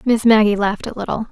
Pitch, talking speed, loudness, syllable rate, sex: 215 Hz, 230 wpm, -16 LUFS, 6.9 syllables/s, female